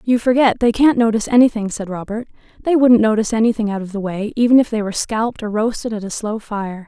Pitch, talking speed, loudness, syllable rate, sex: 220 Hz, 235 wpm, -17 LUFS, 6.5 syllables/s, female